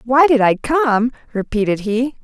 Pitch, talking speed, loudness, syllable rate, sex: 245 Hz, 160 wpm, -16 LUFS, 4.4 syllables/s, female